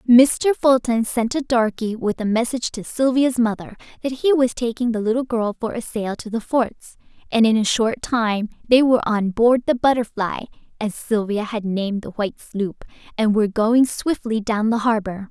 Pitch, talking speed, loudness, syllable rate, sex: 230 Hz, 190 wpm, -20 LUFS, 4.9 syllables/s, female